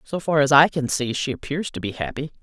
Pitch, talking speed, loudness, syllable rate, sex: 145 Hz, 275 wpm, -21 LUFS, 5.8 syllables/s, female